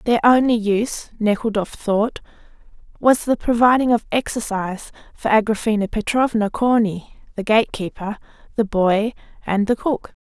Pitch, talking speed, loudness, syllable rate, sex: 220 Hz, 130 wpm, -19 LUFS, 4.7 syllables/s, female